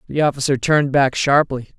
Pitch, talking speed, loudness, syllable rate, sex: 140 Hz, 170 wpm, -17 LUFS, 5.9 syllables/s, female